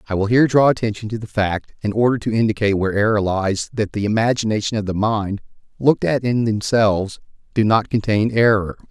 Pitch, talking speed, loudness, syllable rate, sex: 110 Hz, 195 wpm, -19 LUFS, 6.1 syllables/s, male